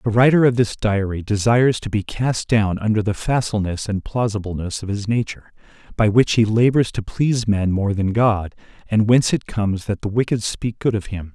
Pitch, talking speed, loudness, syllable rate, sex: 110 Hz, 205 wpm, -19 LUFS, 5.4 syllables/s, male